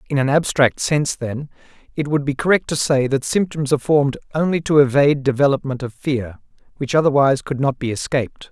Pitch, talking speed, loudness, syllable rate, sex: 140 Hz, 190 wpm, -18 LUFS, 6.0 syllables/s, male